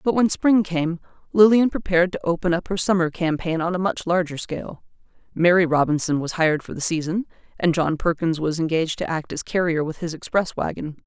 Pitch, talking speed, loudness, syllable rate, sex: 170 Hz, 200 wpm, -21 LUFS, 5.8 syllables/s, female